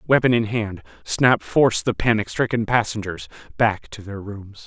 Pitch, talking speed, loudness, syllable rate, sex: 105 Hz, 165 wpm, -21 LUFS, 4.6 syllables/s, male